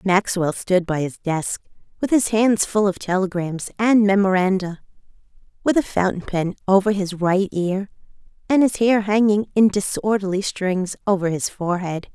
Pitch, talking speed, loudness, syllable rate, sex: 195 Hz, 155 wpm, -20 LUFS, 4.7 syllables/s, female